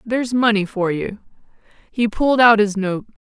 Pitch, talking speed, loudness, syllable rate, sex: 215 Hz, 165 wpm, -17 LUFS, 5.5 syllables/s, female